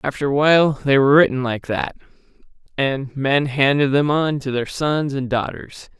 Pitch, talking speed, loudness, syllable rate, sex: 140 Hz, 180 wpm, -18 LUFS, 4.8 syllables/s, male